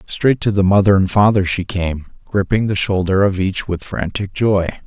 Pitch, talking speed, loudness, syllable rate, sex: 95 Hz, 195 wpm, -16 LUFS, 4.8 syllables/s, male